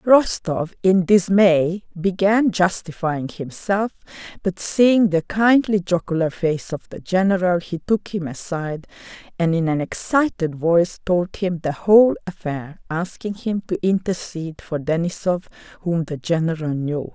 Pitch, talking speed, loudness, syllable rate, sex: 180 Hz, 135 wpm, -20 LUFS, 4.3 syllables/s, female